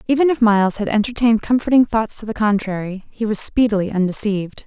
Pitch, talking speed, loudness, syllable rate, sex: 215 Hz, 180 wpm, -18 LUFS, 6.3 syllables/s, female